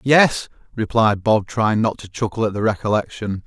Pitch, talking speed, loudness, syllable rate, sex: 110 Hz, 175 wpm, -19 LUFS, 4.8 syllables/s, male